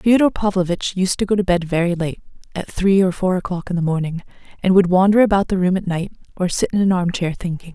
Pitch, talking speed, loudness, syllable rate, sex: 185 Hz, 250 wpm, -18 LUFS, 6.2 syllables/s, female